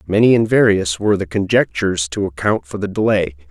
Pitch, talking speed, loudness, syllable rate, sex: 95 Hz, 190 wpm, -17 LUFS, 5.9 syllables/s, male